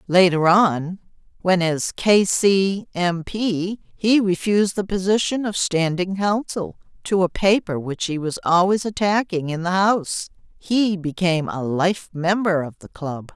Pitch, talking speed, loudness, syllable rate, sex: 185 Hz, 155 wpm, -20 LUFS, 4.1 syllables/s, female